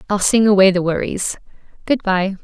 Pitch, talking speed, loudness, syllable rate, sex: 195 Hz, 170 wpm, -16 LUFS, 5.2 syllables/s, female